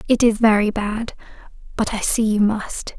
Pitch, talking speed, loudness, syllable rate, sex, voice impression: 215 Hz, 160 wpm, -19 LUFS, 4.6 syllables/s, female, feminine, slightly young, slightly relaxed, bright, soft, slightly raspy, cute, slightly refreshing, calm, friendly, reassuring, elegant, slightly sweet, kind